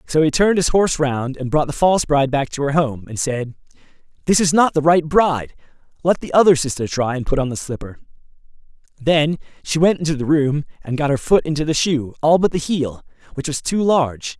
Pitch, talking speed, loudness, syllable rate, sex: 150 Hz, 225 wpm, -18 LUFS, 5.8 syllables/s, male